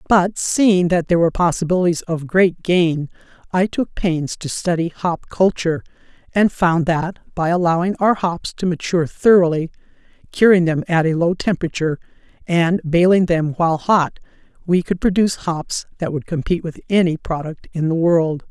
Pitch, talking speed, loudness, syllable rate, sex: 170 Hz, 160 wpm, -18 LUFS, 5.1 syllables/s, female